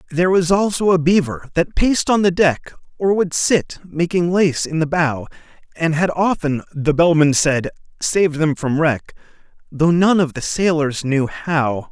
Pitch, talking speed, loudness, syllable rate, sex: 160 Hz, 175 wpm, -17 LUFS, 4.4 syllables/s, male